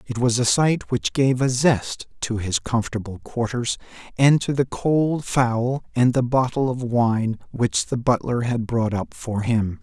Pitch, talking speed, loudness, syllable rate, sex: 120 Hz, 185 wpm, -22 LUFS, 4.0 syllables/s, male